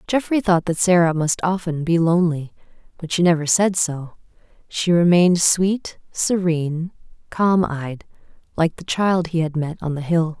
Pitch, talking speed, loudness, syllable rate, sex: 170 Hz, 160 wpm, -19 LUFS, 4.6 syllables/s, female